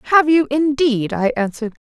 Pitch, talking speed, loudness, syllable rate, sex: 275 Hz, 160 wpm, -17 LUFS, 5.5 syllables/s, female